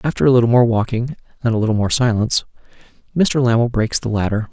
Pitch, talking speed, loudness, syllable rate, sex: 120 Hz, 200 wpm, -17 LUFS, 6.6 syllables/s, male